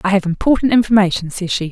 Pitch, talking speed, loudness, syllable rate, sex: 200 Hz, 210 wpm, -15 LUFS, 6.6 syllables/s, female